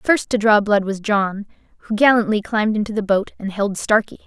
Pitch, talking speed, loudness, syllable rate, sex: 210 Hz, 210 wpm, -18 LUFS, 5.4 syllables/s, female